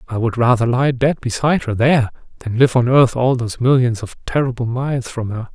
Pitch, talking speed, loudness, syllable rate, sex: 125 Hz, 215 wpm, -17 LUFS, 5.8 syllables/s, male